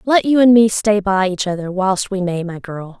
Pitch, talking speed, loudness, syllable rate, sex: 200 Hz, 260 wpm, -16 LUFS, 4.8 syllables/s, female